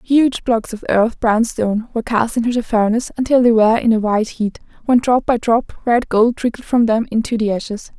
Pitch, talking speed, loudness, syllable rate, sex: 230 Hz, 225 wpm, -16 LUFS, 5.6 syllables/s, female